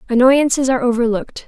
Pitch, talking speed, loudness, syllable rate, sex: 250 Hz, 120 wpm, -15 LUFS, 7.0 syllables/s, female